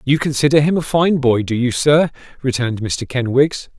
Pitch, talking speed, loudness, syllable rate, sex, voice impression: 135 Hz, 190 wpm, -16 LUFS, 5.1 syllables/s, male, masculine, adult-like, bright, clear, fluent, friendly, lively, slightly intense, light